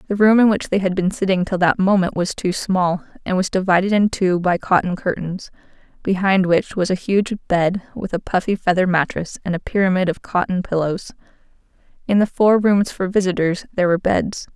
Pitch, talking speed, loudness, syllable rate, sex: 185 Hz, 200 wpm, -19 LUFS, 5.4 syllables/s, female